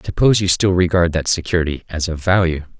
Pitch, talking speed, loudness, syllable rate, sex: 85 Hz, 215 wpm, -17 LUFS, 6.5 syllables/s, male